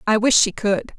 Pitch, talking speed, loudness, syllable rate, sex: 215 Hz, 245 wpm, -18 LUFS, 5.0 syllables/s, female